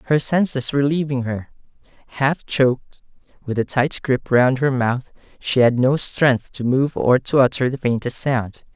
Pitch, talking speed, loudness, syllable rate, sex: 130 Hz, 180 wpm, -19 LUFS, 4.5 syllables/s, male